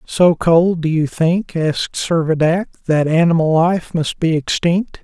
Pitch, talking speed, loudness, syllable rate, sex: 165 Hz, 155 wpm, -16 LUFS, 4.0 syllables/s, male